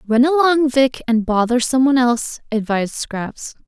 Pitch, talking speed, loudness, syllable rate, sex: 250 Hz, 165 wpm, -17 LUFS, 4.9 syllables/s, female